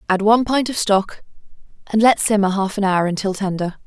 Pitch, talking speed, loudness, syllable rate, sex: 205 Hz, 200 wpm, -18 LUFS, 5.6 syllables/s, female